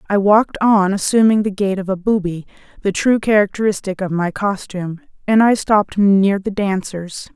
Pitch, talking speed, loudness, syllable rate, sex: 200 Hz, 170 wpm, -16 LUFS, 5.1 syllables/s, female